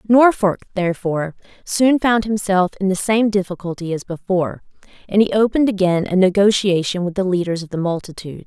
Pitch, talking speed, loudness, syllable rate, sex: 195 Hz, 165 wpm, -18 LUFS, 5.9 syllables/s, female